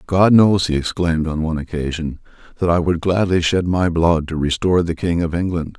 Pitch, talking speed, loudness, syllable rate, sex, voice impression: 85 Hz, 210 wpm, -18 LUFS, 5.5 syllables/s, male, masculine, middle-aged, slightly relaxed, slightly dark, slightly hard, clear, slightly raspy, cool, intellectual, calm, mature, friendly, wild, kind, modest